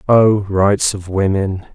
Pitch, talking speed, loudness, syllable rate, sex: 100 Hz, 140 wpm, -15 LUFS, 3.3 syllables/s, male